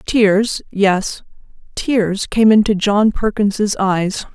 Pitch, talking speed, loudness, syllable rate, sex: 205 Hz, 85 wpm, -16 LUFS, 2.9 syllables/s, female